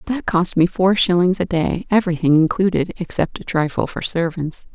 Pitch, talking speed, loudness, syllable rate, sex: 175 Hz, 175 wpm, -18 LUFS, 5.2 syllables/s, female